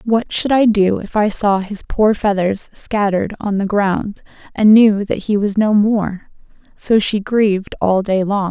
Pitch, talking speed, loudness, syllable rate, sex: 205 Hz, 190 wpm, -16 LUFS, 4.1 syllables/s, female